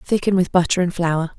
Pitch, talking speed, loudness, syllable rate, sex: 175 Hz, 215 wpm, -19 LUFS, 5.4 syllables/s, female